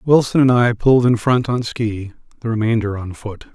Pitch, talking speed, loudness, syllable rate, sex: 115 Hz, 205 wpm, -17 LUFS, 5.0 syllables/s, male